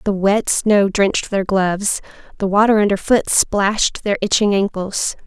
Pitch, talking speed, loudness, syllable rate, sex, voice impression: 200 Hz, 150 wpm, -17 LUFS, 4.5 syllables/s, female, very feminine, slightly young, slightly adult-like, thin, tensed, slightly weak, bright, hard, slightly muffled, fluent, slightly raspy, very cute, intellectual, very refreshing, sincere, calm, very friendly, very reassuring, very unique, wild, slightly sweet, lively, slightly strict, slightly intense